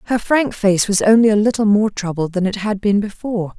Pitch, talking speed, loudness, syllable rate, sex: 205 Hz, 235 wpm, -16 LUFS, 5.6 syllables/s, female